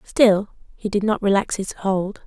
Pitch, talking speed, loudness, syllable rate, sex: 200 Hz, 185 wpm, -20 LUFS, 4.2 syllables/s, female